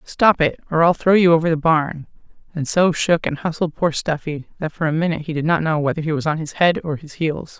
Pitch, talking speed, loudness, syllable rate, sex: 160 Hz, 260 wpm, -19 LUFS, 5.7 syllables/s, female